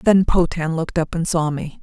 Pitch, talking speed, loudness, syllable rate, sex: 165 Hz, 230 wpm, -20 LUFS, 5.3 syllables/s, female